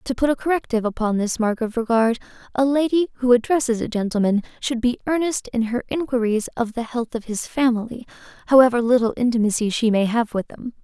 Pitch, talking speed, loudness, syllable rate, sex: 240 Hz, 195 wpm, -21 LUFS, 6.0 syllables/s, female